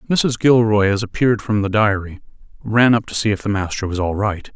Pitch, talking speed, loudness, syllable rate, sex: 105 Hz, 200 wpm, -17 LUFS, 5.6 syllables/s, male